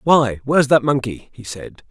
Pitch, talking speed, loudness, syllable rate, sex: 130 Hz, 190 wpm, -16 LUFS, 4.8 syllables/s, male